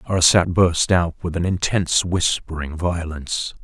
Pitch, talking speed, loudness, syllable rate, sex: 85 Hz, 130 wpm, -20 LUFS, 4.5 syllables/s, male